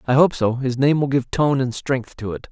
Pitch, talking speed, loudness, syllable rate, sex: 130 Hz, 285 wpm, -20 LUFS, 5.2 syllables/s, male